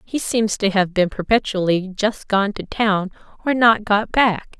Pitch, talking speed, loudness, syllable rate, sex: 205 Hz, 185 wpm, -19 LUFS, 4.2 syllables/s, female